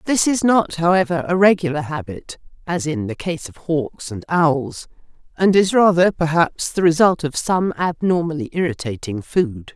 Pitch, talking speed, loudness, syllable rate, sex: 160 Hz, 160 wpm, -18 LUFS, 4.6 syllables/s, female